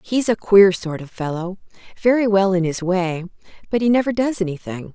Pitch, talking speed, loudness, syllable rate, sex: 195 Hz, 180 wpm, -19 LUFS, 5.3 syllables/s, female